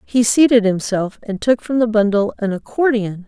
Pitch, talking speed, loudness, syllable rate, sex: 220 Hz, 165 wpm, -17 LUFS, 4.9 syllables/s, female